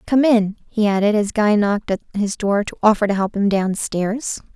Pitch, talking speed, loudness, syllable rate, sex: 210 Hz, 225 wpm, -19 LUFS, 5.0 syllables/s, female